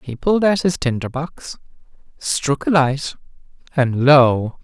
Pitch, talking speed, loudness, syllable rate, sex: 145 Hz, 140 wpm, -17 LUFS, 3.9 syllables/s, male